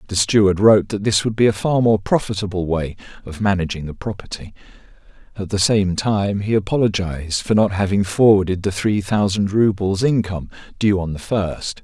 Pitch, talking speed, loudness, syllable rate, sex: 100 Hz, 175 wpm, -18 LUFS, 5.4 syllables/s, male